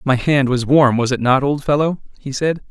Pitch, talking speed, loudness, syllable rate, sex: 135 Hz, 245 wpm, -16 LUFS, 5.2 syllables/s, male